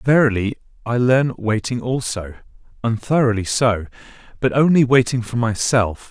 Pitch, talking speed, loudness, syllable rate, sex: 120 Hz, 120 wpm, -18 LUFS, 5.0 syllables/s, male